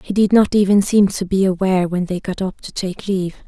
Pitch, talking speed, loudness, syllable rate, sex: 190 Hz, 260 wpm, -17 LUFS, 5.7 syllables/s, female